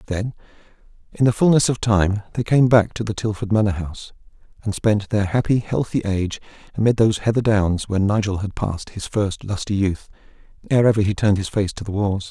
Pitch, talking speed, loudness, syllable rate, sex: 105 Hz, 200 wpm, -20 LUFS, 5.9 syllables/s, male